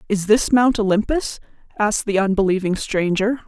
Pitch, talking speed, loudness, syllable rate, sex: 210 Hz, 140 wpm, -19 LUFS, 4.9 syllables/s, female